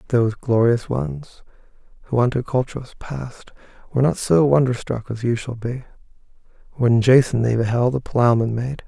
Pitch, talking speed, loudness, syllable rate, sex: 125 Hz, 155 wpm, -20 LUFS, 5.1 syllables/s, male